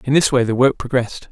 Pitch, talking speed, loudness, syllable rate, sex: 130 Hz, 275 wpm, -17 LUFS, 6.6 syllables/s, male